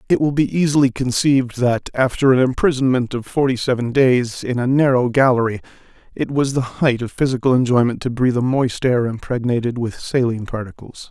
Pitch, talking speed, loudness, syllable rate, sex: 125 Hz, 180 wpm, -18 LUFS, 5.6 syllables/s, male